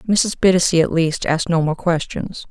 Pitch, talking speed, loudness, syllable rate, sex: 170 Hz, 190 wpm, -18 LUFS, 5.3 syllables/s, female